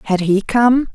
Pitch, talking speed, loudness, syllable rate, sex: 220 Hz, 190 wpm, -15 LUFS, 4.7 syllables/s, female